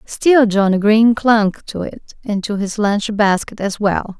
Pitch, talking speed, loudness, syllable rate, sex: 210 Hz, 185 wpm, -16 LUFS, 3.9 syllables/s, female